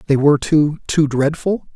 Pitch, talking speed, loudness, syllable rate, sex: 150 Hz, 170 wpm, -16 LUFS, 4.7 syllables/s, male